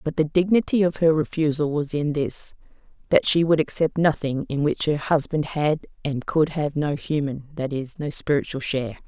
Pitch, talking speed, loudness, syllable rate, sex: 150 Hz, 185 wpm, -23 LUFS, 5.0 syllables/s, female